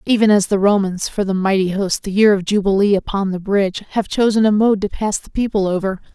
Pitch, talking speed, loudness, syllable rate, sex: 200 Hz, 235 wpm, -17 LUFS, 5.7 syllables/s, female